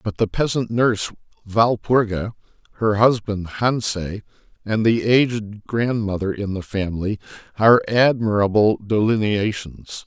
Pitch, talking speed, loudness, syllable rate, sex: 110 Hz, 105 wpm, -20 LUFS, 4.4 syllables/s, male